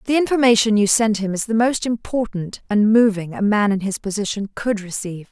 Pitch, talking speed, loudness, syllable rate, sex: 210 Hz, 205 wpm, -19 LUFS, 5.6 syllables/s, female